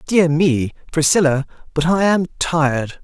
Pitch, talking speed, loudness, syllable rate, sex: 160 Hz, 140 wpm, -17 LUFS, 4.3 syllables/s, male